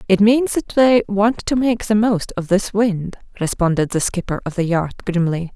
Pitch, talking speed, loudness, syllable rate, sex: 200 Hz, 205 wpm, -18 LUFS, 4.5 syllables/s, female